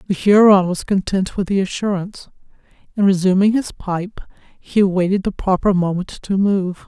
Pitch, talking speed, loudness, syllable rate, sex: 190 Hz, 155 wpm, -17 LUFS, 5.0 syllables/s, female